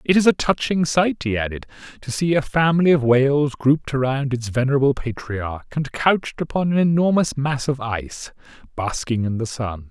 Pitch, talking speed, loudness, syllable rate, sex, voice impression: 135 Hz, 180 wpm, -20 LUFS, 5.2 syllables/s, male, masculine, middle-aged, fluent, raspy, slightly refreshing, calm, friendly, reassuring, unique, slightly wild, lively, kind